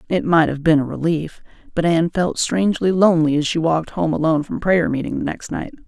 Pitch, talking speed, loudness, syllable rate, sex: 160 Hz, 225 wpm, -19 LUFS, 6.1 syllables/s, female